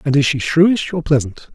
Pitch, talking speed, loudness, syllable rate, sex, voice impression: 150 Hz, 235 wpm, -16 LUFS, 5.6 syllables/s, male, masculine, very adult-like, slightly muffled, slightly sincere, calm, reassuring